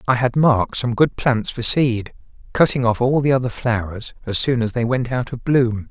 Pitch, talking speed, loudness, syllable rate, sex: 120 Hz, 225 wpm, -19 LUFS, 4.9 syllables/s, male